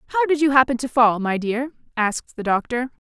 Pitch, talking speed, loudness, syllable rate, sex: 250 Hz, 215 wpm, -20 LUFS, 5.7 syllables/s, female